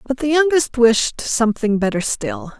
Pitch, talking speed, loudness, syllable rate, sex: 250 Hz, 160 wpm, -17 LUFS, 4.6 syllables/s, female